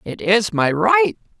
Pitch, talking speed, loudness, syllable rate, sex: 165 Hz, 170 wpm, -17 LUFS, 3.6 syllables/s, male